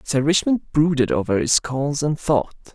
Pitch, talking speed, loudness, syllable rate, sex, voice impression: 140 Hz, 175 wpm, -20 LUFS, 4.7 syllables/s, male, masculine, adult-like, tensed, powerful, slightly bright, clear, friendly, wild, lively, slightly intense